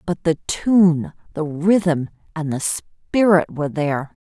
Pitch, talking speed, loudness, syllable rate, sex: 165 Hz, 140 wpm, -19 LUFS, 3.7 syllables/s, female